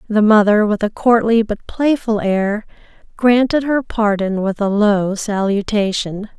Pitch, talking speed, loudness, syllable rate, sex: 215 Hz, 140 wpm, -16 LUFS, 4.1 syllables/s, female